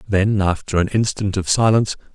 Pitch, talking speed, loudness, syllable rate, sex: 100 Hz, 170 wpm, -18 LUFS, 5.4 syllables/s, male